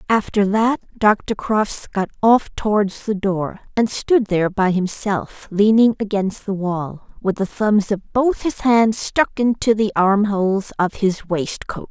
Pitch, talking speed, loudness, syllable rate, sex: 205 Hz, 160 wpm, -19 LUFS, 3.9 syllables/s, female